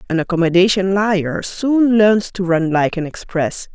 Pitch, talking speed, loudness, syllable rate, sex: 185 Hz, 160 wpm, -16 LUFS, 4.2 syllables/s, female